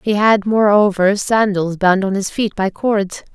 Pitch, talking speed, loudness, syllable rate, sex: 200 Hz, 180 wpm, -15 LUFS, 4.1 syllables/s, female